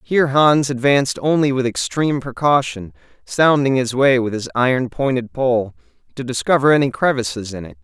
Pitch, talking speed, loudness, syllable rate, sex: 130 Hz, 160 wpm, -17 LUFS, 5.3 syllables/s, male